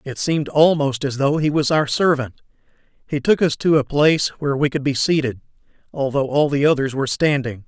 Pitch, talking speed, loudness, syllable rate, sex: 145 Hz, 205 wpm, -19 LUFS, 5.8 syllables/s, male